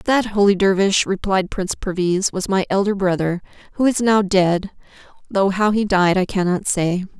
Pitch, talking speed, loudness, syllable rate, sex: 195 Hz, 175 wpm, -18 LUFS, 4.8 syllables/s, female